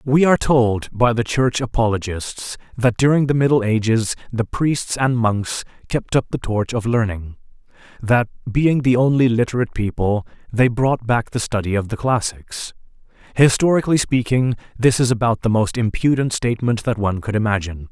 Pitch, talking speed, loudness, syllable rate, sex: 115 Hz, 165 wpm, -19 LUFS, 5.1 syllables/s, male